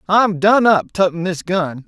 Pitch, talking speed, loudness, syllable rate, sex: 185 Hz, 190 wpm, -16 LUFS, 4.1 syllables/s, male